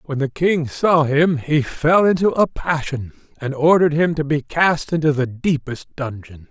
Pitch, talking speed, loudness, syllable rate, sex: 150 Hz, 185 wpm, -18 LUFS, 4.4 syllables/s, male